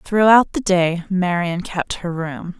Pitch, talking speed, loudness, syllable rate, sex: 185 Hz, 160 wpm, -18 LUFS, 3.7 syllables/s, female